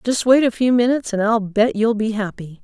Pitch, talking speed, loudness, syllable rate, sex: 225 Hz, 250 wpm, -18 LUFS, 5.6 syllables/s, female